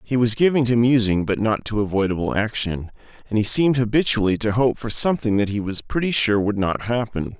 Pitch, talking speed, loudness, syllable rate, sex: 115 Hz, 210 wpm, -20 LUFS, 5.8 syllables/s, male